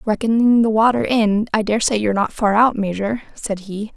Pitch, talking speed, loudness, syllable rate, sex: 215 Hz, 195 wpm, -17 LUFS, 5.4 syllables/s, female